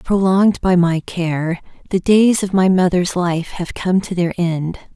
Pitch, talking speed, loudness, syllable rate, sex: 180 Hz, 180 wpm, -17 LUFS, 4.1 syllables/s, female